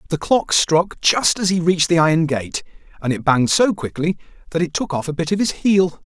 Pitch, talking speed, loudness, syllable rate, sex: 165 Hz, 235 wpm, -18 LUFS, 5.5 syllables/s, male